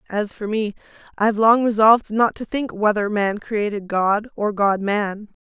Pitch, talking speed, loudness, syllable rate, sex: 210 Hz, 175 wpm, -20 LUFS, 4.5 syllables/s, female